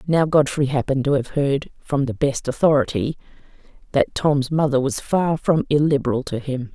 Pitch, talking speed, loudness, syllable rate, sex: 140 Hz, 170 wpm, -20 LUFS, 5.0 syllables/s, female